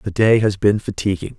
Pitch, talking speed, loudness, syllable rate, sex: 100 Hz, 215 wpm, -18 LUFS, 5.5 syllables/s, male